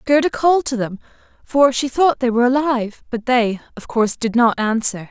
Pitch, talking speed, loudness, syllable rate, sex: 245 Hz, 200 wpm, -18 LUFS, 5.5 syllables/s, female